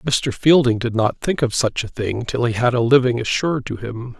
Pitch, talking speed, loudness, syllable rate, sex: 120 Hz, 245 wpm, -19 LUFS, 5.1 syllables/s, male